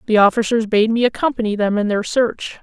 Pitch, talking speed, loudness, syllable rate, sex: 220 Hz, 205 wpm, -17 LUFS, 5.7 syllables/s, female